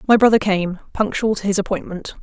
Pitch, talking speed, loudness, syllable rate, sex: 200 Hz, 190 wpm, -19 LUFS, 5.8 syllables/s, female